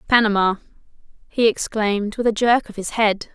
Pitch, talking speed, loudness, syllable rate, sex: 215 Hz, 160 wpm, -19 LUFS, 5.4 syllables/s, female